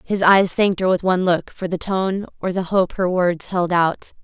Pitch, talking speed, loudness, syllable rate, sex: 185 Hz, 240 wpm, -19 LUFS, 4.9 syllables/s, female